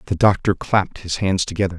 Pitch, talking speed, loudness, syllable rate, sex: 95 Hz, 200 wpm, -20 LUFS, 6.2 syllables/s, male